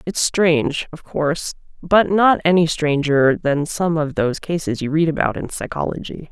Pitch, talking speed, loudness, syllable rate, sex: 155 Hz, 170 wpm, -18 LUFS, 4.8 syllables/s, female